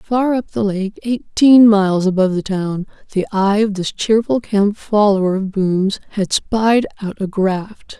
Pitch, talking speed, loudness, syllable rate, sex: 205 Hz, 160 wpm, -16 LUFS, 4.1 syllables/s, female